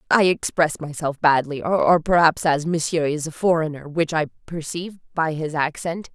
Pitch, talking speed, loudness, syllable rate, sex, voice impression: 160 Hz, 165 wpm, -21 LUFS, 4.9 syllables/s, female, very feminine, middle-aged, slightly thin, very tensed, very powerful, bright, very hard, very clear, very fluent, slightly raspy, very cool, very intellectual, refreshing, very sincere, slightly calm, slightly friendly, slightly reassuring, very unique, elegant, very wild, slightly sweet, lively, very strict, intense, sharp